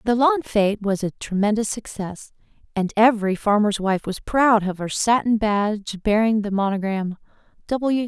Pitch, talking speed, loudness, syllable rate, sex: 215 Hz, 155 wpm, -21 LUFS, 4.8 syllables/s, female